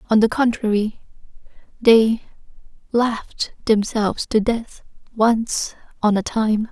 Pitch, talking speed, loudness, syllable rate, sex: 220 Hz, 100 wpm, -19 LUFS, 3.8 syllables/s, female